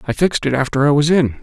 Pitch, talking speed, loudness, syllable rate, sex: 145 Hz, 295 wpm, -16 LUFS, 7.4 syllables/s, male